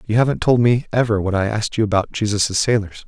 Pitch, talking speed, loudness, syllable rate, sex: 110 Hz, 235 wpm, -18 LUFS, 6.2 syllables/s, male